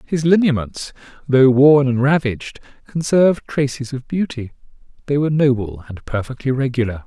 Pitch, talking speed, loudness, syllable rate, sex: 135 Hz, 135 wpm, -17 LUFS, 5.2 syllables/s, male